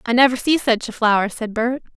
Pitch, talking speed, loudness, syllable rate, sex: 235 Hz, 245 wpm, -18 LUFS, 5.8 syllables/s, female